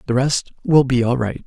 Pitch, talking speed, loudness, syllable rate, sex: 130 Hz, 245 wpm, -18 LUFS, 5.0 syllables/s, male